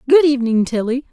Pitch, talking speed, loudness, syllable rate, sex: 260 Hz, 160 wpm, -16 LUFS, 6.7 syllables/s, female